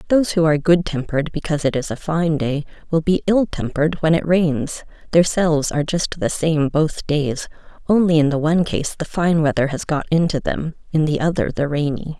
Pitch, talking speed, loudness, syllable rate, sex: 160 Hz, 210 wpm, -19 LUFS, 5.5 syllables/s, female